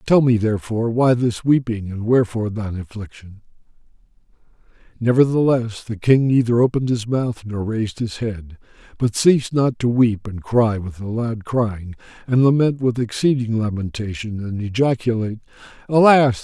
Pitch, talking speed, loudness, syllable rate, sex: 115 Hz, 145 wpm, -19 LUFS, 5.2 syllables/s, male